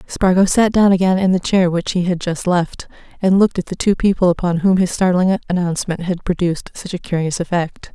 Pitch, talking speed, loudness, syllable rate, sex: 180 Hz, 220 wpm, -17 LUFS, 5.7 syllables/s, female